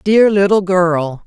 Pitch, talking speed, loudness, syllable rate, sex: 185 Hz, 140 wpm, -13 LUFS, 3.3 syllables/s, female